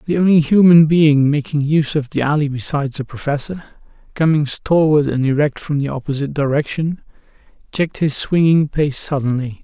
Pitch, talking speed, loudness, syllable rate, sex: 150 Hz, 155 wpm, -16 LUFS, 5.5 syllables/s, male